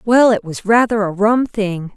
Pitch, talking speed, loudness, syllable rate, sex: 210 Hz, 215 wpm, -15 LUFS, 4.3 syllables/s, female